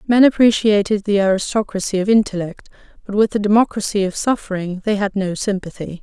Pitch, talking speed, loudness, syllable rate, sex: 200 Hz, 160 wpm, -17 LUFS, 5.8 syllables/s, female